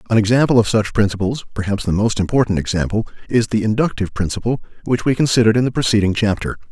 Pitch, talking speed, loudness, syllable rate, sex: 110 Hz, 180 wpm, -18 LUFS, 7.0 syllables/s, male